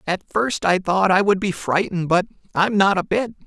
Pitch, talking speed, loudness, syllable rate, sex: 190 Hz, 225 wpm, -19 LUFS, 5.2 syllables/s, male